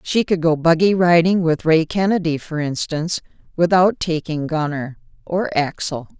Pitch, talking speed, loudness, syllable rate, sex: 165 Hz, 145 wpm, -18 LUFS, 4.6 syllables/s, female